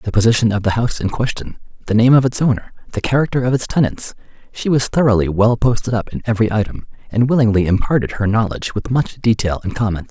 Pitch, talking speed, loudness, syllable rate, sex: 110 Hz, 215 wpm, -17 LUFS, 6.5 syllables/s, male